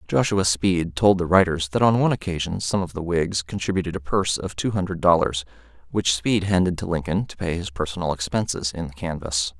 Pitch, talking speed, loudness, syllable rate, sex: 90 Hz, 205 wpm, -23 LUFS, 5.7 syllables/s, male